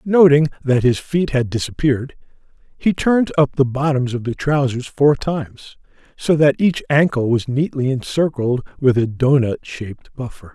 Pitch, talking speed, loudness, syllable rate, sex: 135 Hz, 160 wpm, -17 LUFS, 4.7 syllables/s, male